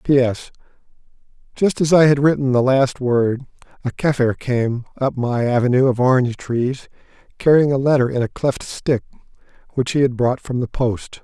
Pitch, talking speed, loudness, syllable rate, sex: 130 Hz, 170 wpm, -18 LUFS, 4.9 syllables/s, male